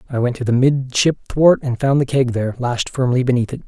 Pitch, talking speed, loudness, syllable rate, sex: 130 Hz, 245 wpm, -17 LUFS, 5.8 syllables/s, male